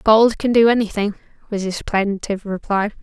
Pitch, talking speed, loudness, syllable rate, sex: 210 Hz, 160 wpm, -19 LUFS, 5.2 syllables/s, female